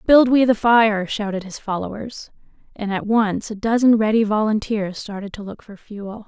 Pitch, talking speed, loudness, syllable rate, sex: 215 Hz, 180 wpm, -19 LUFS, 4.7 syllables/s, female